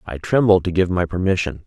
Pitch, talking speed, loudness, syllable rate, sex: 95 Hz, 215 wpm, -18 LUFS, 5.8 syllables/s, male